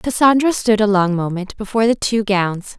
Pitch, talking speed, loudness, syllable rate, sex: 210 Hz, 195 wpm, -17 LUFS, 5.1 syllables/s, female